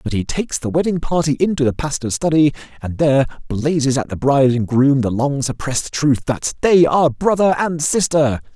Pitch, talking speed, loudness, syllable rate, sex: 140 Hz, 195 wpm, -17 LUFS, 5.5 syllables/s, male